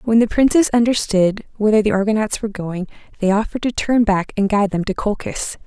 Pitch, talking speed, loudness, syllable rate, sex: 210 Hz, 200 wpm, -18 LUFS, 6.0 syllables/s, female